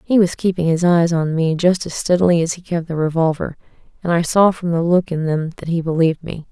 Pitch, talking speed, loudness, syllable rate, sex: 170 Hz, 250 wpm, -18 LUFS, 5.8 syllables/s, female